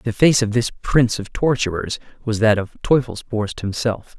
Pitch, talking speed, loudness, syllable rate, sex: 115 Hz, 170 wpm, -20 LUFS, 4.8 syllables/s, male